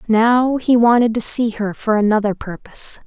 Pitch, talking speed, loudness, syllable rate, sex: 225 Hz, 175 wpm, -16 LUFS, 4.8 syllables/s, female